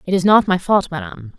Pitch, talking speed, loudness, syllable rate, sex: 180 Hz, 260 wpm, -15 LUFS, 6.2 syllables/s, female